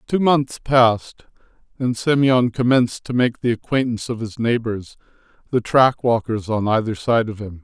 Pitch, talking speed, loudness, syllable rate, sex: 120 Hz, 165 wpm, -19 LUFS, 4.8 syllables/s, male